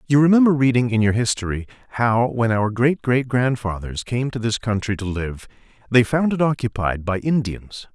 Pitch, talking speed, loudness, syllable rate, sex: 120 Hz, 180 wpm, -20 LUFS, 5.0 syllables/s, male